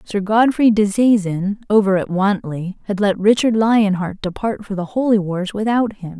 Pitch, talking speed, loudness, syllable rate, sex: 200 Hz, 175 wpm, -17 LUFS, 4.6 syllables/s, female